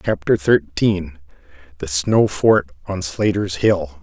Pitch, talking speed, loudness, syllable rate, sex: 105 Hz, 105 wpm, -18 LUFS, 3.6 syllables/s, male